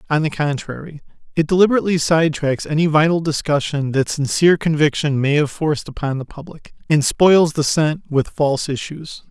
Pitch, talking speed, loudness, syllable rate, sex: 155 Hz, 170 wpm, -17 LUFS, 5.4 syllables/s, male